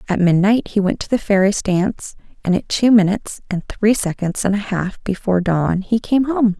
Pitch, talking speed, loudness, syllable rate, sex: 200 Hz, 210 wpm, -18 LUFS, 5.1 syllables/s, female